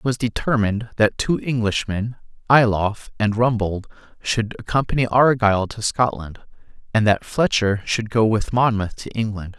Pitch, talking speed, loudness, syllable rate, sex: 110 Hz, 145 wpm, -20 LUFS, 4.9 syllables/s, male